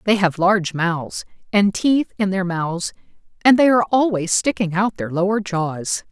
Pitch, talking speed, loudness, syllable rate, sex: 185 Hz, 175 wpm, -19 LUFS, 4.5 syllables/s, female